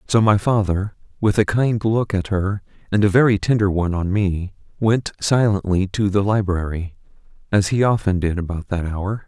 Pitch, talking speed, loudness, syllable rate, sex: 100 Hz, 180 wpm, -19 LUFS, 4.9 syllables/s, male